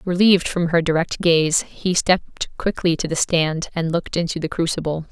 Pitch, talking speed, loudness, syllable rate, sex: 170 Hz, 190 wpm, -20 LUFS, 5.1 syllables/s, female